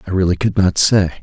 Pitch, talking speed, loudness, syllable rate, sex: 95 Hz, 245 wpm, -15 LUFS, 6.1 syllables/s, male